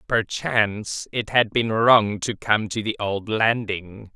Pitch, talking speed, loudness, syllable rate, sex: 110 Hz, 160 wpm, -22 LUFS, 3.6 syllables/s, male